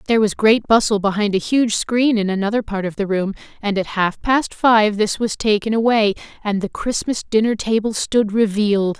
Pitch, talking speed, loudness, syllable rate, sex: 215 Hz, 200 wpm, -18 LUFS, 5.1 syllables/s, female